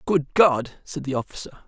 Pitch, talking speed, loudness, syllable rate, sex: 150 Hz, 180 wpm, -22 LUFS, 4.9 syllables/s, male